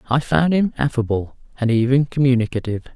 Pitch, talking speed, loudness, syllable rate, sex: 125 Hz, 140 wpm, -19 LUFS, 6.1 syllables/s, male